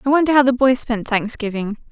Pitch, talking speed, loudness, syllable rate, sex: 240 Hz, 220 wpm, -17 LUFS, 6.0 syllables/s, female